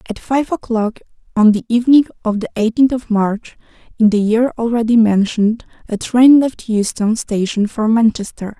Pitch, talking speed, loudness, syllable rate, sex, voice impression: 225 Hz, 160 wpm, -15 LUFS, 4.9 syllables/s, female, feminine, adult-like, slightly relaxed, slightly weak, soft, slightly muffled, slightly raspy, slightly refreshing, calm, friendly, reassuring, kind, modest